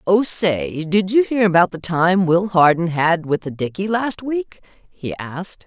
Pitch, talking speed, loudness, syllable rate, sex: 185 Hz, 190 wpm, -18 LUFS, 4.1 syllables/s, female